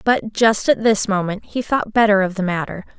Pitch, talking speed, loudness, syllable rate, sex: 210 Hz, 220 wpm, -18 LUFS, 5.1 syllables/s, female